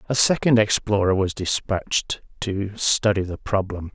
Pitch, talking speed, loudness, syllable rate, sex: 100 Hz, 135 wpm, -21 LUFS, 4.5 syllables/s, male